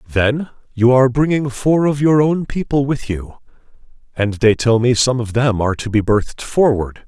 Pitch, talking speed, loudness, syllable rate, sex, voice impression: 125 Hz, 195 wpm, -16 LUFS, 4.8 syllables/s, male, masculine, middle-aged, thick, powerful, clear, slightly halting, cool, calm, mature, friendly, wild, lively, slightly strict